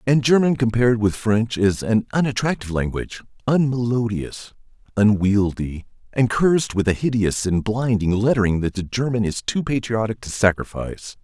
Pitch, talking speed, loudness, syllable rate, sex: 110 Hz, 145 wpm, -20 LUFS, 5.2 syllables/s, male